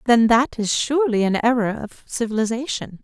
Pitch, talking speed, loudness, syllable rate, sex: 230 Hz, 160 wpm, -20 LUFS, 5.5 syllables/s, female